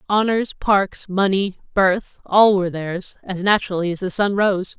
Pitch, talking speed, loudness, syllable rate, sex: 195 Hz, 150 wpm, -19 LUFS, 4.5 syllables/s, female